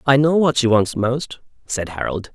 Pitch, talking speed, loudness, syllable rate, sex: 125 Hz, 205 wpm, -19 LUFS, 4.5 syllables/s, male